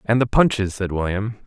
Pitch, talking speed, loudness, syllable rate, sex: 105 Hz, 205 wpm, -20 LUFS, 5.4 syllables/s, male